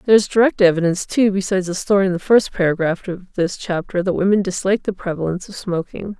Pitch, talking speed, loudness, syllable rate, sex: 190 Hz, 215 wpm, -18 LUFS, 6.6 syllables/s, female